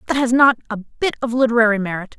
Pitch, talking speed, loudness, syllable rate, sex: 235 Hz, 220 wpm, -17 LUFS, 6.6 syllables/s, female